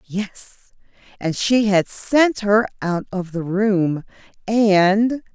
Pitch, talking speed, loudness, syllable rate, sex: 205 Hz, 125 wpm, -19 LUFS, 2.9 syllables/s, female